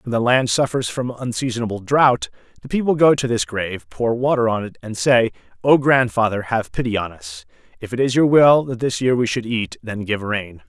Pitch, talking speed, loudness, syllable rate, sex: 120 Hz, 220 wpm, -19 LUFS, 5.3 syllables/s, male